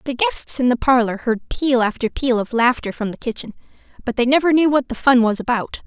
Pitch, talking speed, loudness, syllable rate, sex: 250 Hz, 235 wpm, -18 LUFS, 5.8 syllables/s, female